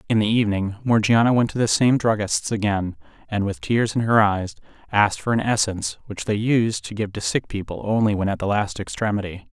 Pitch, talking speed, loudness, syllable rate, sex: 105 Hz, 215 wpm, -21 LUFS, 5.6 syllables/s, male